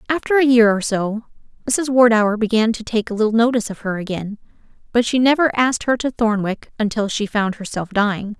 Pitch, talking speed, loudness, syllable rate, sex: 225 Hz, 200 wpm, -18 LUFS, 5.8 syllables/s, female